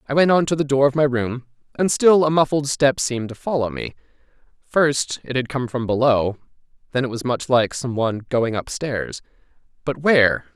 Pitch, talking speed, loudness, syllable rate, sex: 130 Hz, 195 wpm, -20 LUFS, 5.2 syllables/s, male